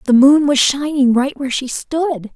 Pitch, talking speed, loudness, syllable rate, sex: 275 Hz, 205 wpm, -15 LUFS, 4.6 syllables/s, female